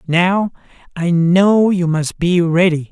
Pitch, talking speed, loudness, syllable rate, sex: 175 Hz, 145 wpm, -15 LUFS, 3.5 syllables/s, male